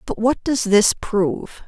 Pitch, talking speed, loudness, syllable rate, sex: 215 Hz, 180 wpm, -18 LUFS, 4.5 syllables/s, female